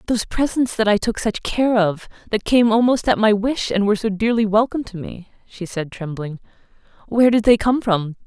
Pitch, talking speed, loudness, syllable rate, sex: 215 Hz, 210 wpm, -19 LUFS, 5.5 syllables/s, female